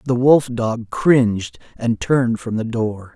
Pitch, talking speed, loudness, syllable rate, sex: 120 Hz, 170 wpm, -18 LUFS, 3.9 syllables/s, male